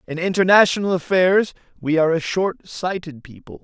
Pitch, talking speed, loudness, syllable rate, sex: 175 Hz, 150 wpm, -19 LUFS, 5.3 syllables/s, male